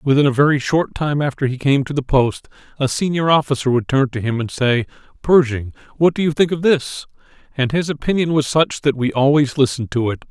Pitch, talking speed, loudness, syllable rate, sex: 140 Hz, 220 wpm, -17 LUFS, 5.7 syllables/s, male